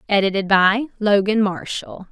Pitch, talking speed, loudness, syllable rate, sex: 195 Hz, 115 wpm, -18 LUFS, 4.5 syllables/s, female